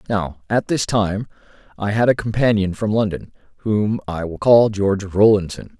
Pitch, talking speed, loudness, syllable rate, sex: 105 Hz, 165 wpm, -18 LUFS, 4.8 syllables/s, male